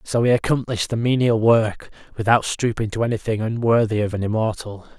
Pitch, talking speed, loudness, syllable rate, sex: 110 Hz, 170 wpm, -20 LUFS, 5.7 syllables/s, male